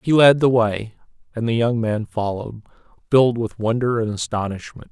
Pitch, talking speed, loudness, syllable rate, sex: 115 Hz, 170 wpm, -20 LUFS, 5.4 syllables/s, male